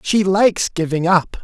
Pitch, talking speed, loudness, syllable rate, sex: 180 Hz, 165 wpm, -16 LUFS, 4.6 syllables/s, male